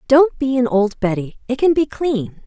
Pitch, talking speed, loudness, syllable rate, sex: 250 Hz, 220 wpm, -18 LUFS, 5.0 syllables/s, female